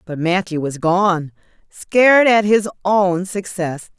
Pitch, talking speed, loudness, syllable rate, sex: 185 Hz, 135 wpm, -16 LUFS, 3.7 syllables/s, female